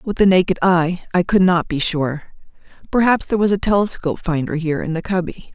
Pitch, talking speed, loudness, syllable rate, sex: 180 Hz, 205 wpm, -18 LUFS, 6.0 syllables/s, female